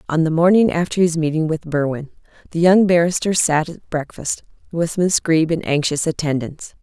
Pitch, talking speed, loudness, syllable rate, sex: 165 Hz, 175 wpm, -18 LUFS, 5.2 syllables/s, female